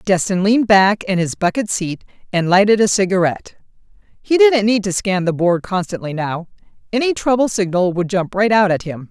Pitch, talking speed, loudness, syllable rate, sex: 195 Hz, 190 wpm, -16 LUFS, 5.4 syllables/s, female